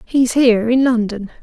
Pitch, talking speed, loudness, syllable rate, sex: 240 Hz, 170 wpm, -15 LUFS, 4.9 syllables/s, female